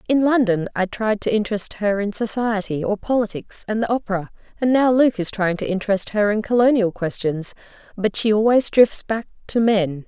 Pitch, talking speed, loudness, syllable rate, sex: 210 Hz, 175 wpm, -20 LUFS, 5.3 syllables/s, female